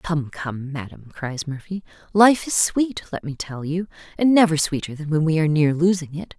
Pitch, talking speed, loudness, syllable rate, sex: 160 Hz, 205 wpm, -21 LUFS, 5.0 syllables/s, female